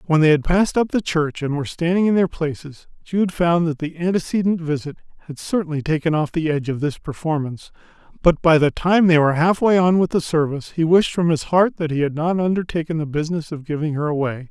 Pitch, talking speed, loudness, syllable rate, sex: 160 Hz, 230 wpm, -19 LUFS, 6.1 syllables/s, male